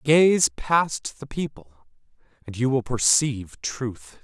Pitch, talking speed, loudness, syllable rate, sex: 130 Hz, 130 wpm, -23 LUFS, 3.4 syllables/s, male